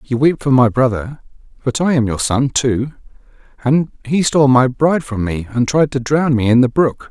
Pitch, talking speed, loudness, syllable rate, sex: 130 Hz, 220 wpm, -15 LUFS, 5.1 syllables/s, male